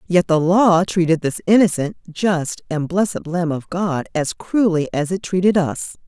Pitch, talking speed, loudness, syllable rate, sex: 175 Hz, 180 wpm, -18 LUFS, 4.3 syllables/s, female